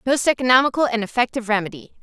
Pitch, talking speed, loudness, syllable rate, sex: 235 Hz, 150 wpm, -19 LUFS, 7.6 syllables/s, female